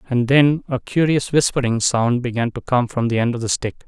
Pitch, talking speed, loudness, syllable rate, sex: 125 Hz, 230 wpm, -19 LUFS, 5.2 syllables/s, male